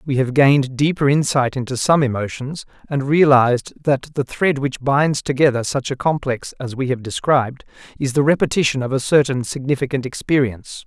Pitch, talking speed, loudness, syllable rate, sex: 135 Hz, 170 wpm, -18 LUFS, 5.4 syllables/s, male